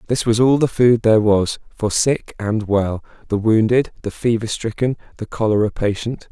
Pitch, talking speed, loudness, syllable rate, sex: 110 Hz, 180 wpm, -18 LUFS, 4.8 syllables/s, male